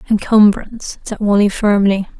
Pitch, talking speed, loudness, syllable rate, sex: 205 Hz, 110 wpm, -14 LUFS, 4.9 syllables/s, female